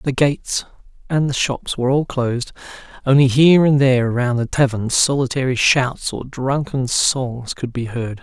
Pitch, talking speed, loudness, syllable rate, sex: 130 Hz, 160 wpm, -18 LUFS, 4.6 syllables/s, male